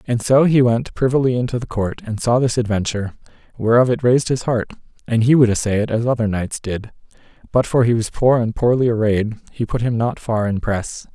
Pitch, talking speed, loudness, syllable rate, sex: 115 Hz, 220 wpm, -18 LUFS, 5.7 syllables/s, male